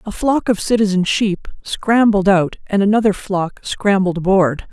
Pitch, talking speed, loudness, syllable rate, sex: 200 Hz, 155 wpm, -16 LUFS, 4.4 syllables/s, female